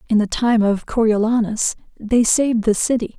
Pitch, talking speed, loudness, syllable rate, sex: 225 Hz, 170 wpm, -18 LUFS, 5.0 syllables/s, female